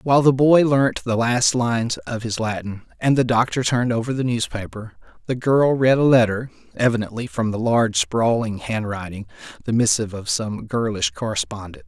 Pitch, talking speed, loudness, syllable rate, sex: 115 Hz, 165 wpm, -20 LUFS, 5.2 syllables/s, male